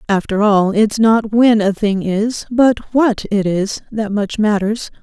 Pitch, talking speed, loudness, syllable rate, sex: 210 Hz, 180 wpm, -15 LUFS, 3.7 syllables/s, female